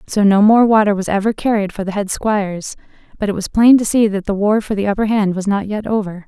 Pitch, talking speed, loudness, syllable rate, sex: 205 Hz, 260 wpm, -15 LUFS, 6.0 syllables/s, female